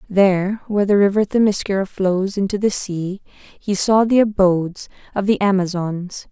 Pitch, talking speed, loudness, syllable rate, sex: 195 Hz, 150 wpm, -18 LUFS, 4.7 syllables/s, female